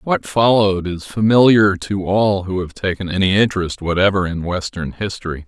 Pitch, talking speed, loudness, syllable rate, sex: 95 Hz, 165 wpm, -17 LUFS, 5.2 syllables/s, male